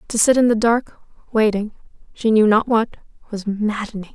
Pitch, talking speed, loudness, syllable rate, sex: 215 Hz, 175 wpm, -18 LUFS, 5.0 syllables/s, female